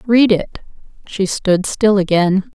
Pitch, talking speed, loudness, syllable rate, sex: 200 Hz, 140 wpm, -15 LUFS, 3.5 syllables/s, female